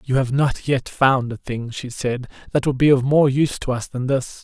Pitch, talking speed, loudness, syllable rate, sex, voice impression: 130 Hz, 255 wpm, -20 LUFS, 4.9 syllables/s, male, very masculine, very adult-like, middle-aged, very thick, very tensed, powerful, slightly bright, hard, very clear, very fluent, very cool, very intellectual, slightly refreshing, very sincere, very calm, mature, very friendly, very reassuring, slightly unique, very elegant, sweet, slightly lively, slightly strict, slightly intense